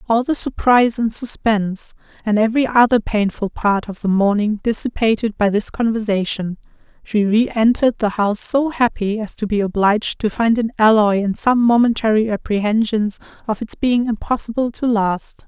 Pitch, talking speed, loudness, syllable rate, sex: 220 Hz, 160 wpm, -17 LUFS, 5.1 syllables/s, female